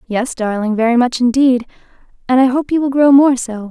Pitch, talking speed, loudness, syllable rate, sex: 250 Hz, 210 wpm, -14 LUFS, 5.4 syllables/s, female